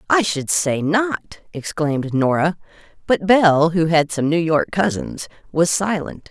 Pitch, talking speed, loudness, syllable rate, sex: 165 Hz, 150 wpm, -18 LUFS, 4.1 syllables/s, female